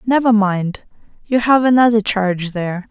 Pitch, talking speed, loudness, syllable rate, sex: 215 Hz, 145 wpm, -15 LUFS, 5.0 syllables/s, female